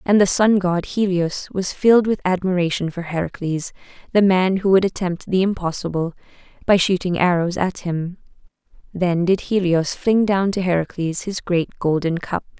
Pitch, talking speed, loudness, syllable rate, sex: 180 Hz, 160 wpm, -20 LUFS, 4.8 syllables/s, female